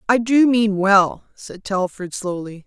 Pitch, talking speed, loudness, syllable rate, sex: 200 Hz, 160 wpm, -18 LUFS, 3.8 syllables/s, female